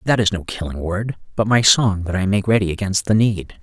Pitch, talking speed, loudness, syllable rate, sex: 100 Hz, 250 wpm, -18 LUFS, 5.5 syllables/s, male